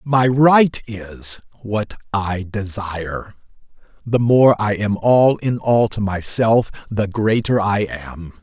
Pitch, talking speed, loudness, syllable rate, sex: 105 Hz, 130 wpm, -18 LUFS, 3.3 syllables/s, male